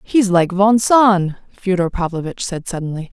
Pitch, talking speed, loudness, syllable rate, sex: 190 Hz, 150 wpm, -16 LUFS, 4.6 syllables/s, female